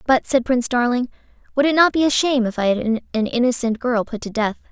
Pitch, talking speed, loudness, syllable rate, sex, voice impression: 245 Hz, 240 wpm, -19 LUFS, 6.2 syllables/s, female, very feminine, slightly young, adult-like, very thin, very tensed, slightly powerful, very bright, very hard, very clear, very fluent, very cute, intellectual, very refreshing, sincere, calm, very friendly, very reassuring, very unique, elegant, slightly wild, very sweet, very lively, kind, slightly intense, sharp, very light